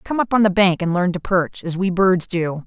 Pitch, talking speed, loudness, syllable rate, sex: 185 Hz, 295 wpm, -18 LUFS, 5.1 syllables/s, female